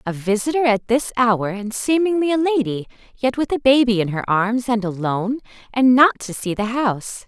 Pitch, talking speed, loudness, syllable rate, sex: 235 Hz, 200 wpm, -19 LUFS, 5.1 syllables/s, female